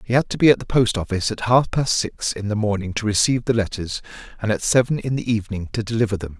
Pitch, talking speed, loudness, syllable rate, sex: 110 Hz, 265 wpm, -21 LUFS, 6.6 syllables/s, male